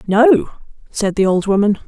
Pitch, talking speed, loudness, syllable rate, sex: 210 Hz, 160 wpm, -15 LUFS, 4.4 syllables/s, female